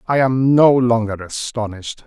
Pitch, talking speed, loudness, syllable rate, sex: 120 Hz, 145 wpm, -16 LUFS, 4.7 syllables/s, male